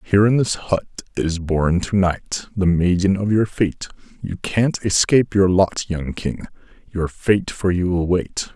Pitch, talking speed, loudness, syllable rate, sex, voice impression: 95 Hz, 180 wpm, -19 LUFS, 4.1 syllables/s, male, masculine, middle-aged, thick, soft, muffled, slightly cool, calm, friendly, reassuring, wild, lively, slightly kind